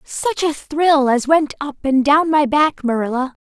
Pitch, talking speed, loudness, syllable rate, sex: 285 Hz, 190 wpm, -17 LUFS, 4.1 syllables/s, female